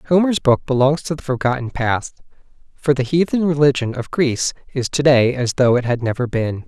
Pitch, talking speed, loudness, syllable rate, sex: 135 Hz, 200 wpm, -18 LUFS, 5.2 syllables/s, male